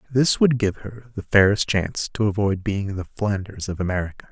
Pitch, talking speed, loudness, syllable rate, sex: 105 Hz, 195 wpm, -22 LUFS, 5.2 syllables/s, male